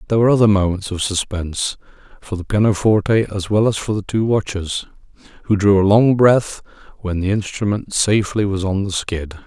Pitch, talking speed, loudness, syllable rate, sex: 100 Hz, 185 wpm, -17 LUFS, 5.6 syllables/s, male